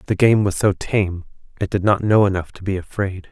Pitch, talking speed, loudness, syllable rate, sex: 100 Hz, 235 wpm, -19 LUFS, 5.4 syllables/s, male